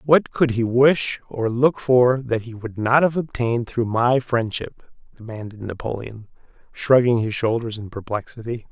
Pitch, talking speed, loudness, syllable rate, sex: 120 Hz, 160 wpm, -21 LUFS, 4.5 syllables/s, male